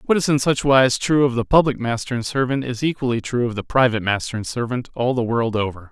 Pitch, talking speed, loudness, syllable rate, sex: 125 Hz, 255 wpm, -20 LUFS, 6.2 syllables/s, male